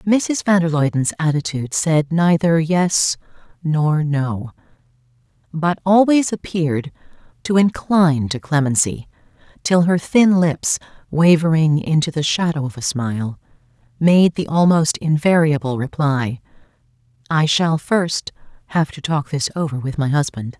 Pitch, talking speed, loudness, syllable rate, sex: 155 Hz, 130 wpm, -18 LUFS, 4.3 syllables/s, female